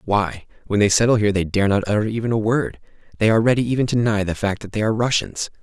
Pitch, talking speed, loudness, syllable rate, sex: 105 Hz, 245 wpm, -20 LUFS, 7.1 syllables/s, male